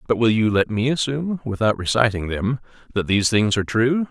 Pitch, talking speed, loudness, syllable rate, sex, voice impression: 115 Hz, 205 wpm, -20 LUFS, 5.9 syllables/s, male, very masculine, very adult-like, slightly thick, intellectual, sincere, calm, slightly mature